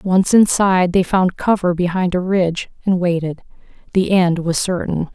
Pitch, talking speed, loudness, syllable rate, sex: 180 Hz, 165 wpm, -17 LUFS, 4.7 syllables/s, female